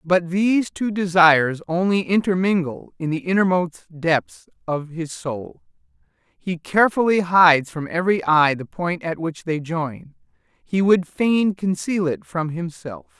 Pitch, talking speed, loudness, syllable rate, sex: 175 Hz, 145 wpm, -20 LUFS, 4.2 syllables/s, male